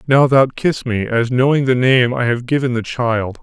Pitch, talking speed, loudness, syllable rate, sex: 125 Hz, 225 wpm, -16 LUFS, 4.6 syllables/s, male